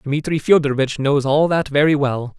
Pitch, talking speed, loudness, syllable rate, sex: 145 Hz, 175 wpm, -17 LUFS, 5.1 syllables/s, male